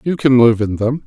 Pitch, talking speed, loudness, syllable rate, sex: 125 Hz, 285 wpm, -14 LUFS, 5.2 syllables/s, male